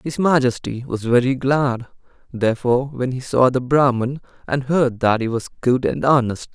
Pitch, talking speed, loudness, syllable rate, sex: 130 Hz, 175 wpm, -19 LUFS, 4.9 syllables/s, male